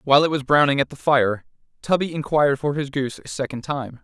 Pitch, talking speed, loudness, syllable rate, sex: 140 Hz, 225 wpm, -21 LUFS, 6.2 syllables/s, male